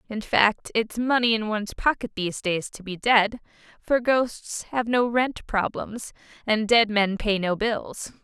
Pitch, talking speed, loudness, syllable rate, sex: 220 Hz, 175 wpm, -24 LUFS, 4.1 syllables/s, female